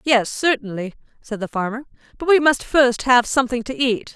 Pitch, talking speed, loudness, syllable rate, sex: 245 Hz, 190 wpm, -19 LUFS, 5.3 syllables/s, female